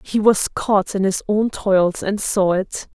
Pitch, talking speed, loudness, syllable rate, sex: 200 Hz, 200 wpm, -19 LUFS, 3.6 syllables/s, female